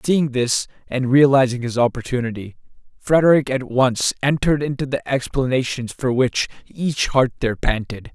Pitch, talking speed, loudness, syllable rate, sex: 130 Hz, 140 wpm, -19 LUFS, 5.0 syllables/s, male